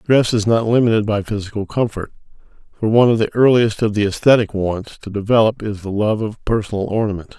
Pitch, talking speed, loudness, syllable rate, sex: 110 Hz, 195 wpm, -17 LUFS, 6.0 syllables/s, male